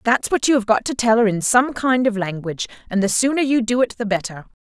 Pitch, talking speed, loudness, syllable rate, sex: 230 Hz, 270 wpm, -19 LUFS, 6.0 syllables/s, female